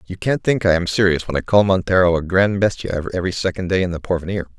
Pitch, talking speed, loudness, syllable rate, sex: 90 Hz, 250 wpm, -18 LUFS, 6.6 syllables/s, male